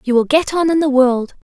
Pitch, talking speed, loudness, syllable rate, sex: 275 Hz, 270 wpm, -15 LUFS, 5.4 syllables/s, female